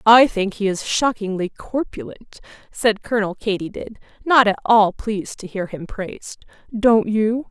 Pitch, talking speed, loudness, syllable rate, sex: 215 Hz, 160 wpm, -19 LUFS, 4.5 syllables/s, female